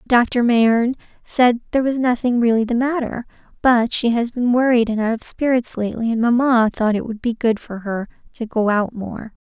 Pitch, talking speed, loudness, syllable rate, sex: 235 Hz, 205 wpm, -18 LUFS, 5.1 syllables/s, female